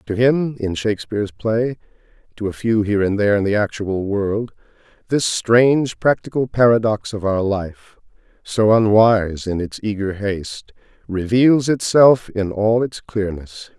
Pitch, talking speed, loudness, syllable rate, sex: 105 Hz, 150 wpm, -18 LUFS, 4.5 syllables/s, male